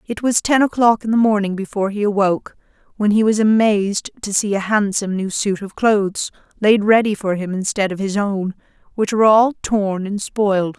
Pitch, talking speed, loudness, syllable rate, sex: 205 Hz, 200 wpm, -17 LUFS, 5.4 syllables/s, female